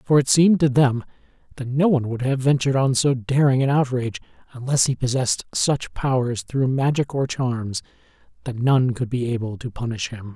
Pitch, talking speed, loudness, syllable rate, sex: 130 Hz, 190 wpm, -21 LUFS, 5.4 syllables/s, male